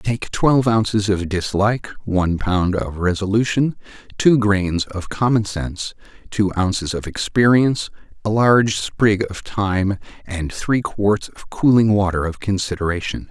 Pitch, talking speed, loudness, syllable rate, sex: 100 Hz, 140 wpm, -19 LUFS, 4.4 syllables/s, male